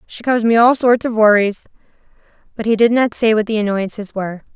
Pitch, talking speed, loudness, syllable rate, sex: 220 Hz, 210 wpm, -15 LUFS, 6.1 syllables/s, female